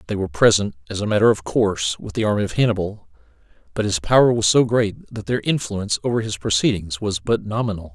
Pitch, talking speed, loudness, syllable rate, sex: 100 Hz, 210 wpm, -20 LUFS, 6.2 syllables/s, male